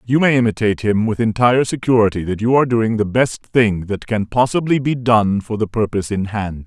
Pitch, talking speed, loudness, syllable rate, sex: 110 Hz, 215 wpm, -17 LUFS, 5.7 syllables/s, male